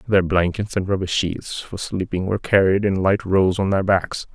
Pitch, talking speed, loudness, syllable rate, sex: 95 Hz, 205 wpm, -20 LUFS, 4.8 syllables/s, male